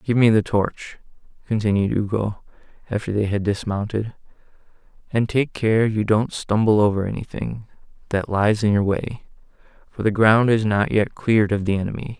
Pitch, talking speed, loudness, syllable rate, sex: 105 Hz, 165 wpm, -21 LUFS, 5.0 syllables/s, male